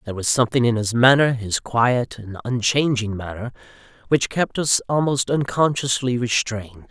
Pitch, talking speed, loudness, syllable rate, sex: 120 Hz, 150 wpm, -20 LUFS, 5.0 syllables/s, male